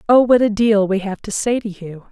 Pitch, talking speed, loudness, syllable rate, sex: 210 Hz, 285 wpm, -16 LUFS, 5.2 syllables/s, female